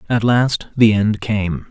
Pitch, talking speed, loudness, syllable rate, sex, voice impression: 110 Hz, 175 wpm, -16 LUFS, 3.5 syllables/s, male, masculine, middle-aged, powerful, clear, mature, slightly unique, wild, lively, strict